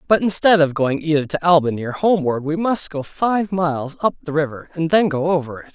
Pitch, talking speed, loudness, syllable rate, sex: 160 Hz, 230 wpm, -19 LUFS, 5.8 syllables/s, male